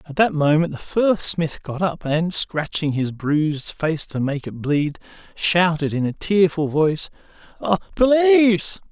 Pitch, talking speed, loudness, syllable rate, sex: 170 Hz, 155 wpm, -20 LUFS, 4.2 syllables/s, male